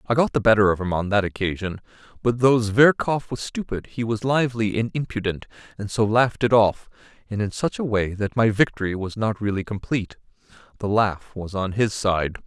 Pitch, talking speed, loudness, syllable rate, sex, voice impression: 110 Hz, 200 wpm, -22 LUFS, 5.5 syllables/s, male, very masculine, very adult-like, very middle-aged, thick, tensed, slightly powerful, bright, hard, clear, fluent, slightly raspy, cool, very intellectual, refreshing, sincere, calm, mature, friendly, reassuring, unique, slightly elegant, wild, sweet, slightly lively, very kind